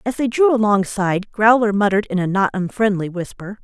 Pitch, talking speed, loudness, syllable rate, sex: 205 Hz, 180 wpm, -18 LUFS, 5.8 syllables/s, female